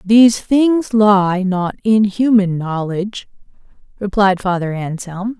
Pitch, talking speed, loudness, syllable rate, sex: 200 Hz, 110 wpm, -15 LUFS, 3.8 syllables/s, female